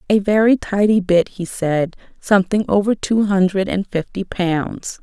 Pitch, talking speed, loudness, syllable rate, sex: 195 Hz, 155 wpm, -18 LUFS, 4.4 syllables/s, female